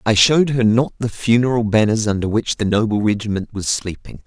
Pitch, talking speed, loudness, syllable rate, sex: 110 Hz, 195 wpm, -17 LUFS, 5.6 syllables/s, male